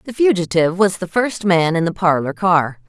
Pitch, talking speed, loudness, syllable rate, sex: 180 Hz, 210 wpm, -17 LUFS, 5.2 syllables/s, female